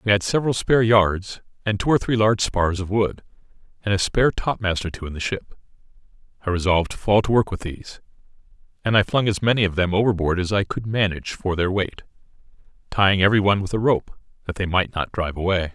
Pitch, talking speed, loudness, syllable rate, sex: 100 Hz, 215 wpm, -21 LUFS, 6.5 syllables/s, male